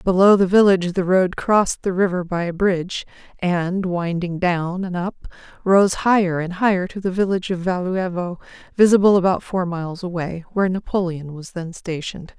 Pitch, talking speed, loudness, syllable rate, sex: 180 Hz, 170 wpm, -20 LUFS, 5.3 syllables/s, female